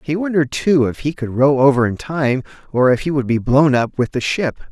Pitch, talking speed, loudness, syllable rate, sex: 140 Hz, 255 wpm, -17 LUFS, 5.5 syllables/s, male